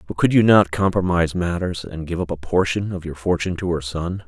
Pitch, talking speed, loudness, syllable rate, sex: 85 Hz, 240 wpm, -20 LUFS, 5.8 syllables/s, male